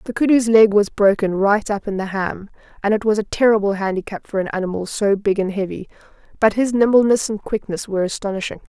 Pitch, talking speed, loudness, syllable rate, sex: 205 Hz, 205 wpm, -18 LUFS, 6.0 syllables/s, female